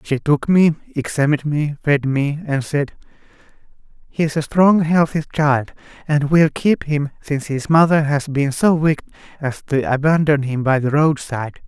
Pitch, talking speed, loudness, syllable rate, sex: 145 Hz, 165 wpm, -18 LUFS, 4.7 syllables/s, male